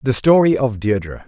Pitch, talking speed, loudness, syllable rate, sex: 120 Hz, 190 wpm, -16 LUFS, 5.2 syllables/s, male